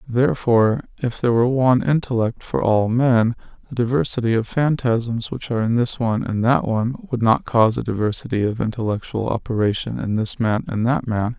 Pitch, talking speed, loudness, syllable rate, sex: 115 Hz, 185 wpm, -20 LUFS, 5.6 syllables/s, male